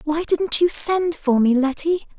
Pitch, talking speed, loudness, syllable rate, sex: 310 Hz, 190 wpm, -18 LUFS, 4.1 syllables/s, female